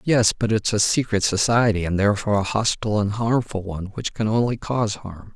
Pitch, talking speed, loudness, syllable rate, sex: 105 Hz, 200 wpm, -21 LUFS, 5.8 syllables/s, male